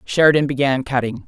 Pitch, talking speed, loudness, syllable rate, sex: 140 Hz, 140 wpm, -17 LUFS, 6.0 syllables/s, female